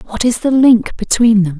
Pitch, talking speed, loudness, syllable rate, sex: 225 Hz, 225 wpm, -12 LUFS, 5.0 syllables/s, female